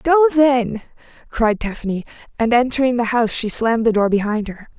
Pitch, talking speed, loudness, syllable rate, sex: 235 Hz, 175 wpm, -18 LUFS, 5.7 syllables/s, female